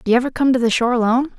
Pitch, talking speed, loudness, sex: 240 Hz, 350 wpm, -17 LUFS, female